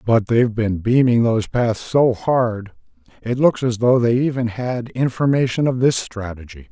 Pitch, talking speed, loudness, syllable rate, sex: 115 Hz, 170 wpm, -18 LUFS, 4.6 syllables/s, male